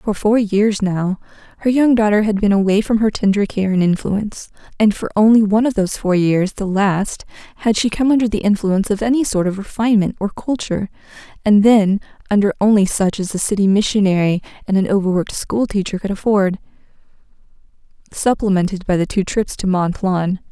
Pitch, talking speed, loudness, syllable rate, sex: 205 Hz, 175 wpm, -17 LUFS, 5.7 syllables/s, female